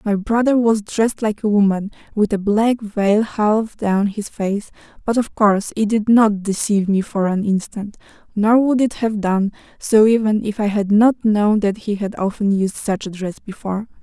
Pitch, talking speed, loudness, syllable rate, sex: 210 Hz, 200 wpm, -18 LUFS, 4.6 syllables/s, female